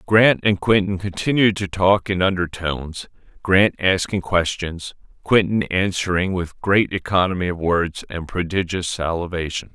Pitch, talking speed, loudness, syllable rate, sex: 95 Hz, 130 wpm, -20 LUFS, 4.5 syllables/s, male